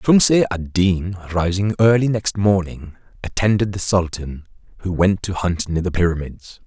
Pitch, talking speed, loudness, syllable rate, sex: 95 Hz, 155 wpm, -19 LUFS, 4.5 syllables/s, male